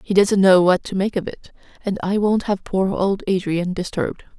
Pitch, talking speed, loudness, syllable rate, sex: 195 Hz, 220 wpm, -19 LUFS, 5.0 syllables/s, female